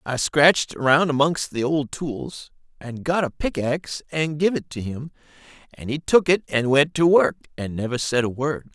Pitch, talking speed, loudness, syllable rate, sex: 145 Hz, 200 wpm, -21 LUFS, 4.7 syllables/s, male